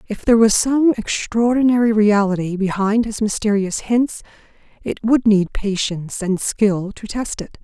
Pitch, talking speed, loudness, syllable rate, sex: 215 Hz, 150 wpm, -18 LUFS, 4.6 syllables/s, female